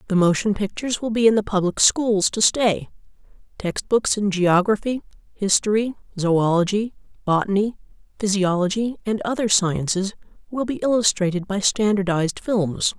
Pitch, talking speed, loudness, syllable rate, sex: 205 Hz, 130 wpm, -21 LUFS, 4.9 syllables/s, female